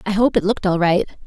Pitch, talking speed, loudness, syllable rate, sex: 195 Hz, 285 wpm, -18 LUFS, 7.2 syllables/s, female